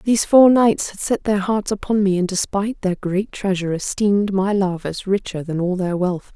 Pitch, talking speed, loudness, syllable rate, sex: 195 Hz, 215 wpm, -19 LUFS, 5.1 syllables/s, female